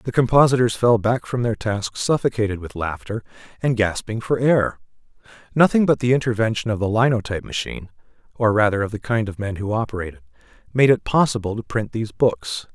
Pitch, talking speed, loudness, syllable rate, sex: 110 Hz, 175 wpm, -20 LUFS, 6.0 syllables/s, male